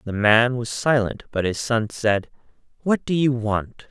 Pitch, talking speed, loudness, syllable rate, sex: 120 Hz, 185 wpm, -21 LUFS, 4.1 syllables/s, male